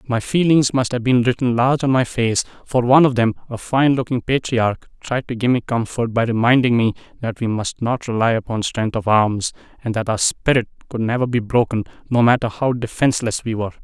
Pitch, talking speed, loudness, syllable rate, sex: 120 Hz, 215 wpm, -18 LUFS, 5.5 syllables/s, male